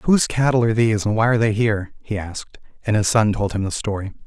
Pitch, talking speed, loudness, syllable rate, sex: 110 Hz, 255 wpm, -20 LUFS, 6.9 syllables/s, male